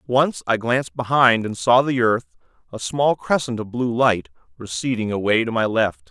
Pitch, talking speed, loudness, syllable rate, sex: 115 Hz, 185 wpm, -20 LUFS, 4.9 syllables/s, male